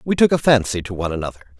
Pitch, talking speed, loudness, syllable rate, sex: 110 Hz, 265 wpm, -18 LUFS, 7.4 syllables/s, male